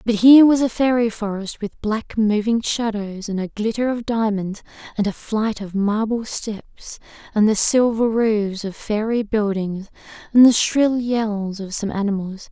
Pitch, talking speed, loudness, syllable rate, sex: 215 Hz, 170 wpm, -19 LUFS, 4.3 syllables/s, female